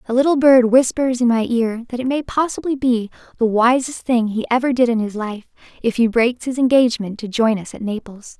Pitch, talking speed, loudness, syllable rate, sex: 240 Hz, 220 wpm, -18 LUFS, 5.5 syllables/s, female